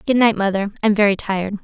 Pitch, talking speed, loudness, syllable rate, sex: 205 Hz, 220 wpm, -18 LUFS, 6.8 syllables/s, female